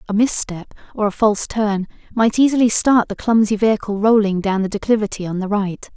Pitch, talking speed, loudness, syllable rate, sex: 210 Hz, 190 wpm, -17 LUFS, 5.7 syllables/s, female